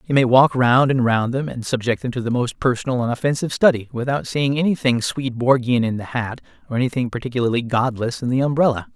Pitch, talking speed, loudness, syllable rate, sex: 125 Hz, 210 wpm, -19 LUFS, 6.2 syllables/s, male